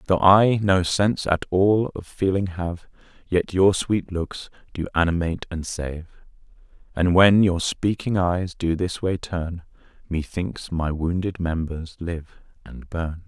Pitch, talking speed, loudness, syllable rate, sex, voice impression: 90 Hz, 150 wpm, -22 LUFS, 3.9 syllables/s, male, very masculine, very adult-like, slightly old, very thick, slightly tensed, powerful, bright, hard, slightly muffled, fluent, very cool, very intellectual, slightly refreshing, very sincere, very calm, mature, friendly, reassuring, unique, elegant, slightly wild, slightly sweet, lively, kind, modest